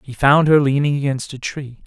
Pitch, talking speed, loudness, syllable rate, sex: 140 Hz, 225 wpm, -17 LUFS, 5.1 syllables/s, male